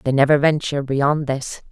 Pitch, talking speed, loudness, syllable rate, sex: 140 Hz, 175 wpm, -19 LUFS, 5.0 syllables/s, female